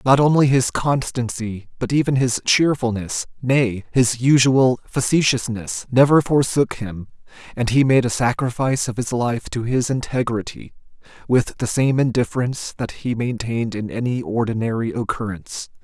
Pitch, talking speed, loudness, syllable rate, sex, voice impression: 125 Hz, 140 wpm, -20 LUFS, 4.8 syllables/s, male, masculine, adult-like, powerful, slightly bright, raspy, slightly cool, intellectual, sincere, calm, slightly wild, lively, slightly sharp, light